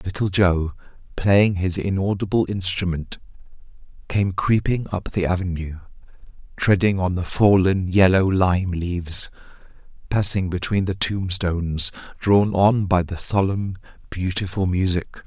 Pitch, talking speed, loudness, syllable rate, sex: 95 Hz, 115 wpm, -21 LUFS, 4.3 syllables/s, male